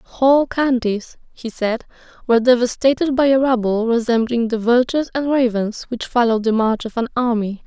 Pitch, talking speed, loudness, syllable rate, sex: 240 Hz, 165 wpm, -18 LUFS, 5.0 syllables/s, female